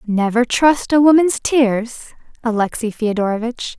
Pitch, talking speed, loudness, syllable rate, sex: 240 Hz, 110 wpm, -16 LUFS, 4.3 syllables/s, female